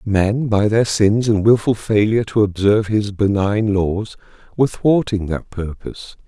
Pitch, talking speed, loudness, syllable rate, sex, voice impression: 105 Hz, 155 wpm, -17 LUFS, 4.6 syllables/s, male, masculine, adult-like, slightly weak, slightly muffled, calm, reassuring, slightly sweet, kind